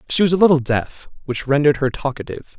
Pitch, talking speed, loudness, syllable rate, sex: 145 Hz, 210 wpm, -18 LUFS, 6.7 syllables/s, male